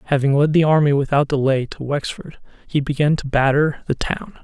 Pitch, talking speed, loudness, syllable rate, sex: 145 Hz, 190 wpm, -19 LUFS, 5.5 syllables/s, male